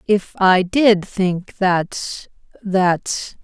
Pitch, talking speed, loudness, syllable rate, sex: 190 Hz, 85 wpm, -18 LUFS, 2.1 syllables/s, female